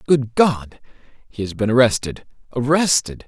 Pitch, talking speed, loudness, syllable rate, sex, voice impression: 125 Hz, 130 wpm, -18 LUFS, 4.7 syllables/s, male, masculine, adult-like, slightly thick, cool, intellectual, slightly refreshing, calm